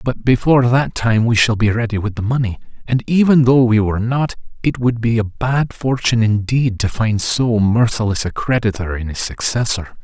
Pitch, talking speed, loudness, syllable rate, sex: 115 Hz, 195 wpm, -16 LUFS, 5.2 syllables/s, male